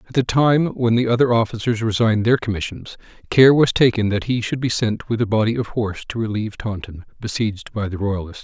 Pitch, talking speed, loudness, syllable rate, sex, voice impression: 110 Hz, 215 wpm, -19 LUFS, 5.9 syllables/s, male, very masculine, very middle-aged, very thick, tensed, very powerful, slightly bright, slightly hard, clear, very muffled, fluent, raspy, very cool, intellectual, slightly refreshing, sincere, calm, mature, friendly, reassuring, very unique, elegant, wild, slightly sweet, lively, kind, slightly modest